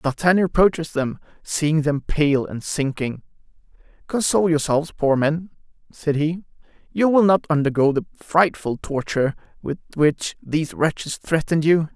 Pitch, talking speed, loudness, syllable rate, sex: 155 Hz, 135 wpm, -21 LUFS, 4.8 syllables/s, male